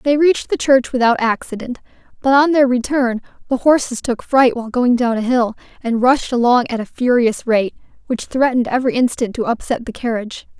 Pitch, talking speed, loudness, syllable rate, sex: 245 Hz, 195 wpm, -16 LUFS, 5.6 syllables/s, female